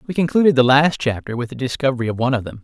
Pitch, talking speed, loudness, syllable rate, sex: 130 Hz, 275 wpm, -18 LUFS, 7.6 syllables/s, male